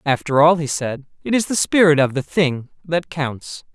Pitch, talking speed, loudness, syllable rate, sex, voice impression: 150 Hz, 210 wpm, -18 LUFS, 4.6 syllables/s, male, very masculine, adult-like, slightly thick, very tensed, powerful, very bright, very soft, very clear, very fluent, slightly raspy, cool, intellectual, very refreshing, sincere, calm, slightly mature, friendly, reassuring, unique, elegant, wild, sweet, very lively, kind, slightly modest